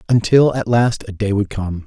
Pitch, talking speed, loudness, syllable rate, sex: 110 Hz, 225 wpm, -17 LUFS, 4.9 syllables/s, male